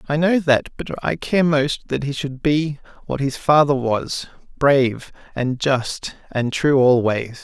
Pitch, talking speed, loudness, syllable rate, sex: 140 Hz, 160 wpm, -19 LUFS, 3.9 syllables/s, male